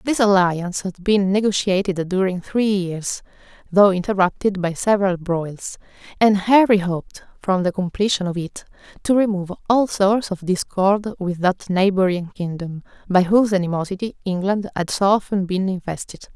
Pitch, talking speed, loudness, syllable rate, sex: 190 Hz, 145 wpm, -20 LUFS, 5.0 syllables/s, female